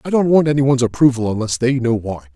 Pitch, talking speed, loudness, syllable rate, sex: 125 Hz, 230 wpm, -16 LUFS, 6.6 syllables/s, male